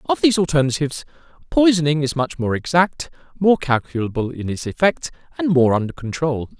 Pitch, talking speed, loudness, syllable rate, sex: 150 Hz, 155 wpm, -19 LUFS, 5.7 syllables/s, male